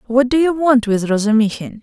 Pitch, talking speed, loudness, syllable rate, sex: 240 Hz, 195 wpm, -15 LUFS, 5.4 syllables/s, female